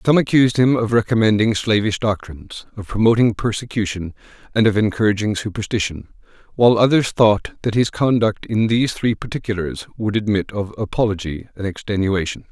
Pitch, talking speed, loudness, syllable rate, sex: 105 Hz, 145 wpm, -19 LUFS, 5.7 syllables/s, male